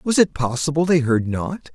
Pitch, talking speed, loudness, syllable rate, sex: 145 Hz, 205 wpm, -20 LUFS, 4.7 syllables/s, male